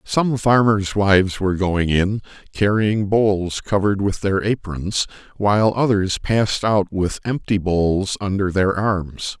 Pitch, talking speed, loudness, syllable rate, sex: 100 Hz, 140 wpm, -19 LUFS, 4.0 syllables/s, male